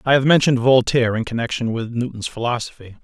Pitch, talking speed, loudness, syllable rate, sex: 120 Hz, 180 wpm, -19 LUFS, 6.6 syllables/s, male